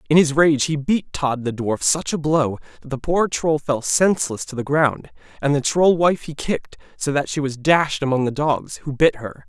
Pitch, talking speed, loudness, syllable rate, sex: 145 Hz, 235 wpm, -20 LUFS, 4.9 syllables/s, male